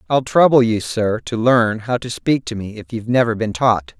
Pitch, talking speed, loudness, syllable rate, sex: 115 Hz, 240 wpm, -17 LUFS, 5.1 syllables/s, male